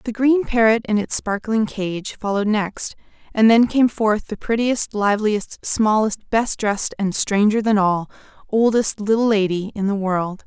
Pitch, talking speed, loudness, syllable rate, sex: 215 Hz, 165 wpm, -19 LUFS, 4.5 syllables/s, female